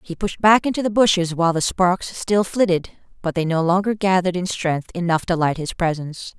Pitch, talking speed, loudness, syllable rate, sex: 180 Hz, 215 wpm, -20 LUFS, 5.6 syllables/s, female